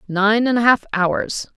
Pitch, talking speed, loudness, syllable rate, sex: 215 Hz, 190 wpm, -17 LUFS, 3.9 syllables/s, female